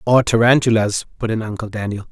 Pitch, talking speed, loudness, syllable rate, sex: 110 Hz, 170 wpm, -18 LUFS, 6.0 syllables/s, male